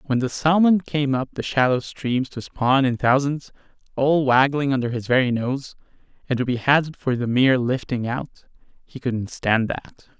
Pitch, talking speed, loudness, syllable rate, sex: 130 Hz, 180 wpm, -21 LUFS, 4.6 syllables/s, male